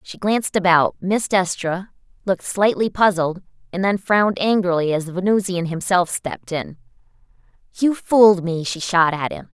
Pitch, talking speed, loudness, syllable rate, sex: 185 Hz, 155 wpm, -19 LUFS, 5.1 syllables/s, female